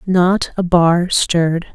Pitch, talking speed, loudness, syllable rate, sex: 175 Hz, 135 wpm, -15 LUFS, 3.3 syllables/s, female